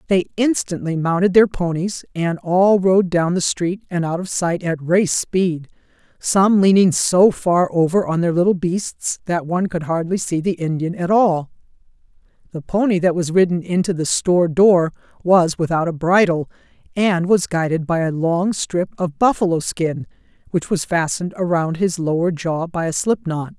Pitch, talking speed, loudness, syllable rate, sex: 175 Hz, 175 wpm, -18 LUFS, 4.6 syllables/s, female